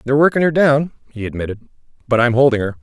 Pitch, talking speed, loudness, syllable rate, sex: 130 Hz, 215 wpm, -16 LUFS, 7.4 syllables/s, male